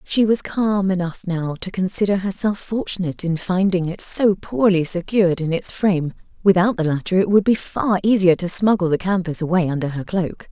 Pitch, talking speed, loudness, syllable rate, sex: 185 Hz, 195 wpm, -19 LUFS, 5.3 syllables/s, female